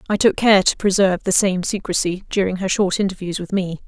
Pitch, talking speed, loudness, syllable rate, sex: 190 Hz, 215 wpm, -18 LUFS, 5.8 syllables/s, female